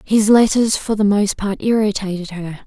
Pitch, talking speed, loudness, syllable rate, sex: 205 Hz, 180 wpm, -16 LUFS, 4.8 syllables/s, female